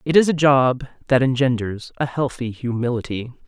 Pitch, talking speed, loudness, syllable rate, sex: 130 Hz, 155 wpm, -20 LUFS, 4.9 syllables/s, female